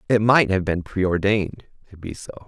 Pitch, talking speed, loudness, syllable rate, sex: 100 Hz, 195 wpm, -20 LUFS, 5.1 syllables/s, male